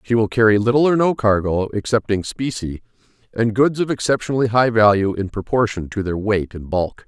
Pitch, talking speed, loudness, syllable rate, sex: 110 Hz, 185 wpm, -18 LUFS, 5.4 syllables/s, male